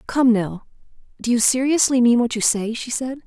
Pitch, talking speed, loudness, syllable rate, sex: 240 Hz, 200 wpm, -19 LUFS, 5.0 syllables/s, female